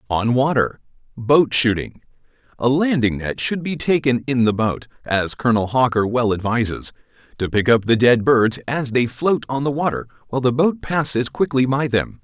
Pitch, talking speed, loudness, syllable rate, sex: 125 Hz, 170 wpm, -19 LUFS, 5.0 syllables/s, male